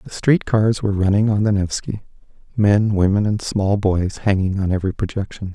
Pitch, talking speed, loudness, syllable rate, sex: 100 Hz, 185 wpm, -19 LUFS, 5.3 syllables/s, male